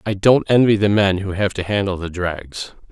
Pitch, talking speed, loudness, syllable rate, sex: 100 Hz, 225 wpm, -18 LUFS, 4.9 syllables/s, male